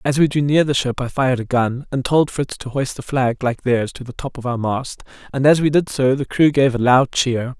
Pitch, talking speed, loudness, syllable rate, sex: 130 Hz, 285 wpm, -18 LUFS, 5.2 syllables/s, male